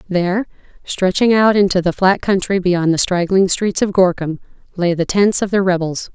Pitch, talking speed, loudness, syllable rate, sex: 185 Hz, 185 wpm, -16 LUFS, 5.0 syllables/s, female